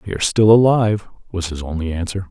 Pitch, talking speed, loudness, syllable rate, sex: 95 Hz, 210 wpm, -17 LUFS, 6.7 syllables/s, male